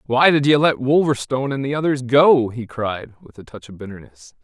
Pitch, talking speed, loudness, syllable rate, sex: 130 Hz, 215 wpm, -17 LUFS, 5.3 syllables/s, male